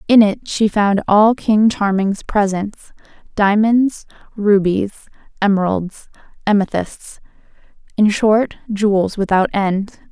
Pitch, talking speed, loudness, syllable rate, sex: 205 Hz, 90 wpm, -16 LUFS, 3.7 syllables/s, female